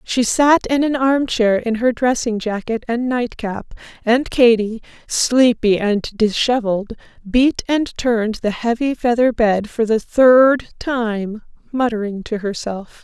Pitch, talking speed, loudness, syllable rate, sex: 230 Hz, 140 wpm, -17 LUFS, 3.9 syllables/s, female